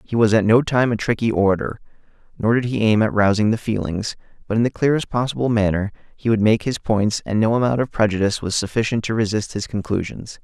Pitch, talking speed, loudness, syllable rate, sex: 110 Hz, 220 wpm, -20 LUFS, 6.1 syllables/s, male